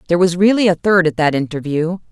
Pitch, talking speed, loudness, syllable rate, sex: 175 Hz, 225 wpm, -15 LUFS, 6.5 syllables/s, female